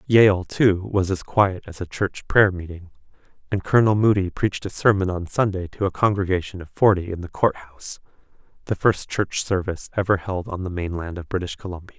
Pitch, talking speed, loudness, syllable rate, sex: 95 Hz, 190 wpm, -22 LUFS, 5.5 syllables/s, male